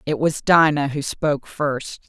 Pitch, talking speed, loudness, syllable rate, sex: 145 Hz, 175 wpm, -20 LUFS, 4.2 syllables/s, female